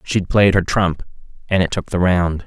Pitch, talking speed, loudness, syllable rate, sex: 90 Hz, 220 wpm, -17 LUFS, 4.6 syllables/s, male